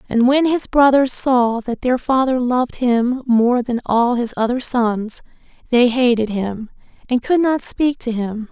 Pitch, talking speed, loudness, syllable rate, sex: 245 Hz, 175 wpm, -17 LUFS, 4.1 syllables/s, female